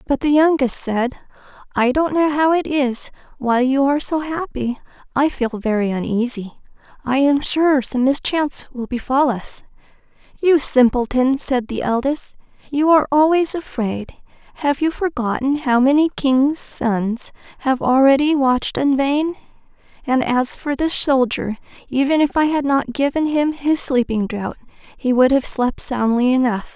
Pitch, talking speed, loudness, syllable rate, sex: 270 Hz, 155 wpm, -18 LUFS, 4.5 syllables/s, female